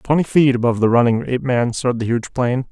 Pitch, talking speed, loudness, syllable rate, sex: 125 Hz, 245 wpm, -17 LUFS, 6.7 syllables/s, male